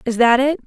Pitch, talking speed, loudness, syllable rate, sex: 255 Hz, 270 wpm, -15 LUFS, 6.0 syllables/s, female